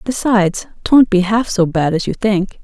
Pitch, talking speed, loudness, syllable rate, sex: 205 Hz, 205 wpm, -15 LUFS, 4.6 syllables/s, female